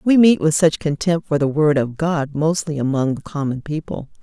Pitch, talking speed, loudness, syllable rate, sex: 155 Hz, 215 wpm, -19 LUFS, 5.0 syllables/s, female